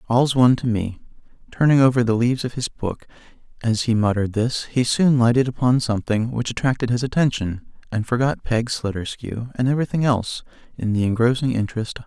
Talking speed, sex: 190 wpm, male